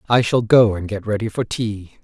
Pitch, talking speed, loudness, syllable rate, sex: 110 Hz, 235 wpm, -18 LUFS, 4.9 syllables/s, male